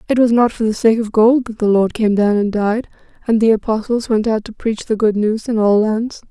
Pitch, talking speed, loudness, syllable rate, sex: 220 Hz, 265 wpm, -16 LUFS, 5.3 syllables/s, female